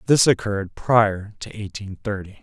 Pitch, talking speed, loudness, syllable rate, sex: 105 Hz, 150 wpm, -21 LUFS, 4.6 syllables/s, male